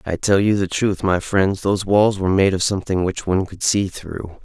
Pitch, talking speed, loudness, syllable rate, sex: 95 Hz, 245 wpm, -19 LUFS, 5.5 syllables/s, male